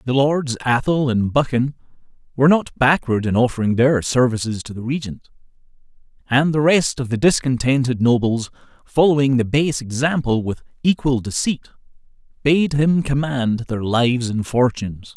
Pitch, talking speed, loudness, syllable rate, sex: 130 Hz, 140 wpm, -19 LUFS, 4.9 syllables/s, male